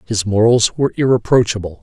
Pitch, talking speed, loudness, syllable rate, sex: 110 Hz, 130 wpm, -15 LUFS, 6.0 syllables/s, male